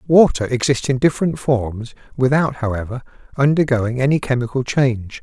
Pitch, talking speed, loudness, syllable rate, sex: 130 Hz, 125 wpm, -18 LUFS, 5.2 syllables/s, male